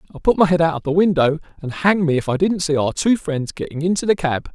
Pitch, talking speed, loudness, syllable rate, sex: 165 Hz, 290 wpm, -18 LUFS, 6.2 syllables/s, male